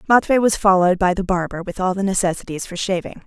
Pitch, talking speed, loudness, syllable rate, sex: 190 Hz, 220 wpm, -19 LUFS, 6.5 syllables/s, female